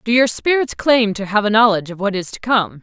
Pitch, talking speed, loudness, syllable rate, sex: 220 Hz, 275 wpm, -16 LUFS, 5.9 syllables/s, female